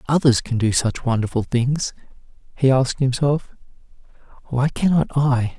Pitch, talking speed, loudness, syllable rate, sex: 130 Hz, 140 wpm, -20 LUFS, 5.0 syllables/s, male